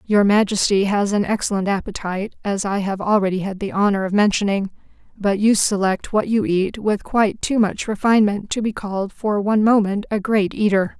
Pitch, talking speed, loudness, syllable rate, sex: 205 Hz, 190 wpm, -19 LUFS, 5.4 syllables/s, female